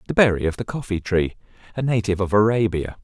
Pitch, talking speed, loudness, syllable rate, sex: 105 Hz, 200 wpm, -21 LUFS, 6.5 syllables/s, male